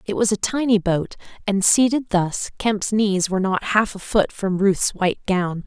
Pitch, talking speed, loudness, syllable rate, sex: 200 Hz, 200 wpm, -20 LUFS, 4.5 syllables/s, female